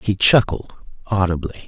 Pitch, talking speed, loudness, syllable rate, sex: 95 Hz, 110 wpm, -18 LUFS, 4.8 syllables/s, male